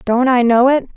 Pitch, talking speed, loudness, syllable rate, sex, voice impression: 250 Hz, 250 wpm, -13 LUFS, 5.2 syllables/s, female, feminine, adult-like, tensed, powerful, bright, slightly soft, clear, slightly raspy, intellectual, calm, friendly, reassuring, elegant, lively, slightly kind